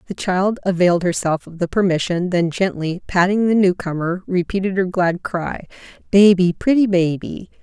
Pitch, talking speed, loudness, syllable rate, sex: 185 Hz, 150 wpm, -18 LUFS, 4.9 syllables/s, female